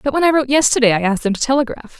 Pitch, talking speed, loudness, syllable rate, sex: 255 Hz, 300 wpm, -15 LUFS, 8.2 syllables/s, female